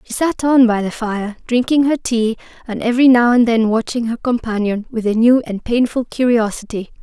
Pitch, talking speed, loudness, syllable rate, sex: 235 Hz, 195 wpm, -16 LUFS, 5.2 syllables/s, female